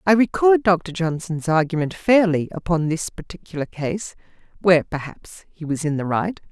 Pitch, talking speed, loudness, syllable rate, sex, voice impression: 170 Hz, 155 wpm, -21 LUFS, 4.9 syllables/s, female, feminine, middle-aged, tensed, powerful, bright, slightly soft, clear, intellectual, calm, friendly, elegant, lively, slightly kind